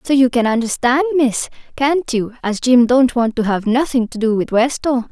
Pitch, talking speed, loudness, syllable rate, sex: 250 Hz, 210 wpm, -16 LUFS, 4.9 syllables/s, female